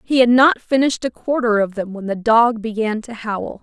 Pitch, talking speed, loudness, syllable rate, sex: 230 Hz, 230 wpm, -17 LUFS, 5.1 syllables/s, female